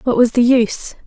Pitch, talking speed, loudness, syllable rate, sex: 240 Hz, 225 wpm, -14 LUFS, 5.6 syllables/s, female